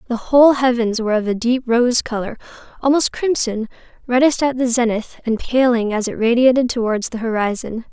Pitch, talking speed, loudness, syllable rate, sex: 240 Hz, 160 wpm, -17 LUFS, 5.5 syllables/s, female